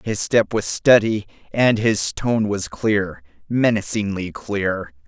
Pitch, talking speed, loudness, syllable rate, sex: 105 Hz, 130 wpm, -20 LUFS, 3.5 syllables/s, male